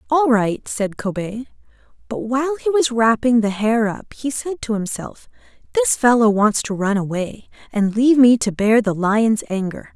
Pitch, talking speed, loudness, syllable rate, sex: 230 Hz, 180 wpm, -18 LUFS, 4.6 syllables/s, female